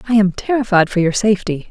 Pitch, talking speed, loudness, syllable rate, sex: 200 Hz, 210 wpm, -16 LUFS, 6.5 syllables/s, female